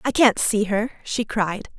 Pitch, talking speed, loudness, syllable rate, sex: 215 Hz, 200 wpm, -21 LUFS, 4.1 syllables/s, female